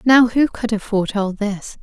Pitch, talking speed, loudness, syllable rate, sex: 220 Hz, 195 wpm, -18 LUFS, 4.7 syllables/s, female